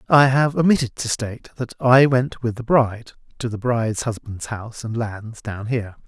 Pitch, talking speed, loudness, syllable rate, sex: 120 Hz, 200 wpm, -21 LUFS, 5.2 syllables/s, male